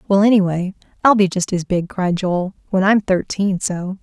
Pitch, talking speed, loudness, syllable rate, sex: 190 Hz, 195 wpm, -18 LUFS, 4.7 syllables/s, female